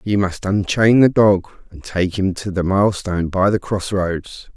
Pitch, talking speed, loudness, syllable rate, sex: 95 Hz, 185 wpm, -18 LUFS, 4.6 syllables/s, male